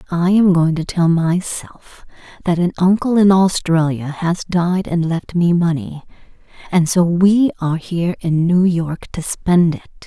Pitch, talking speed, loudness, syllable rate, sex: 175 Hz, 165 wpm, -16 LUFS, 4.2 syllables/s, female